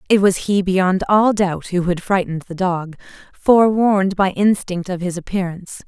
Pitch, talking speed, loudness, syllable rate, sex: 185 Hz, 175 wpm, -17 LUFS, 4.9 syllables/s, female